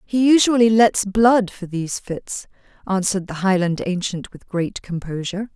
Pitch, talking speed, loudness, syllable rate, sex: 195 Hz, 150 wpm, -19 LUFS, 4.8 syllables/s, female